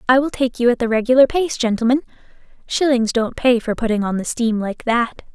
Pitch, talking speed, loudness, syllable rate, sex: 240 Hz, 215 wpm, -18 LUFS, 5.6 syllables/s, female